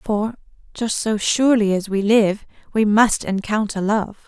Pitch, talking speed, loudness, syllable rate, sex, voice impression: 210 Hz, 155 wpm, -19 LUFS, 4.4 syllables/s, female, feminine, adult-like, fluent, slightly refreshing, sincere, calm, slightly elegant